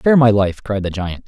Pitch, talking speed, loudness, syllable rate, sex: 105 Hz, 280 wpm, -17 LUFS, 5.7 syllables/s, male